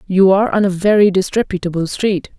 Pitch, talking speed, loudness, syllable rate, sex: 190 Hz, 175 wpm, -15 LUFS, 5.9 syllables/s, female